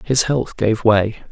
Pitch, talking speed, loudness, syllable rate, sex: 115 Hz, 180 wpm, -17 LUFS, 3.7 syllables/s, male